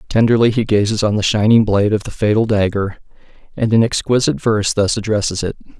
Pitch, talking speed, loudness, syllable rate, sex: 105 Hz, 185 wpm, -16 LUFS, 6.4 syllables/s, male